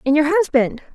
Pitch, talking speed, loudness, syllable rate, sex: 295 Hz, 190 wpm, -17 LUFS, 5.6 syllables/s, female